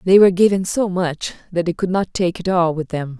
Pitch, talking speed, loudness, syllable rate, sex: 180 Hz, 265 wpm, -18 LUFS, 5.5 syllables/s, female